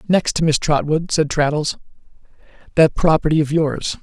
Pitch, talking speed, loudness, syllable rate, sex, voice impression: 155 Hz, 135 wpm, -18 LUFS, 4.5 syllables/s, male, masculine, adult-like, slightly soft, refreshing, slightly sincere, slightly unique